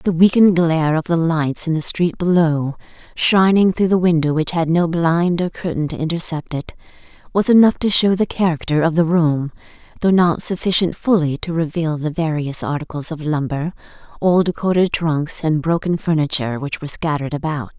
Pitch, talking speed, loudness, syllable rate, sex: 165 Hz, 180 wpm, -18 LUFS, 5.2 syllables/s, female